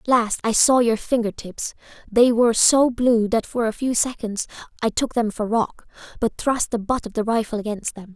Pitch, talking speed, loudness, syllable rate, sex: 225 Hz, 220 wpm, -21 LUFS, 4.9 syllables/s, female